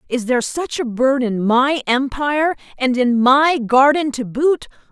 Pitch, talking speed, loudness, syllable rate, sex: 265 Hz, 170 wpm, -17 LUFS, 4.3 syllables/s, female